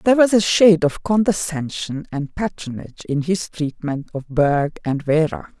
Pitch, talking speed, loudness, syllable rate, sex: 165 Hz, 160 wpm, -19 LUFS, 4.7 syllables/s, female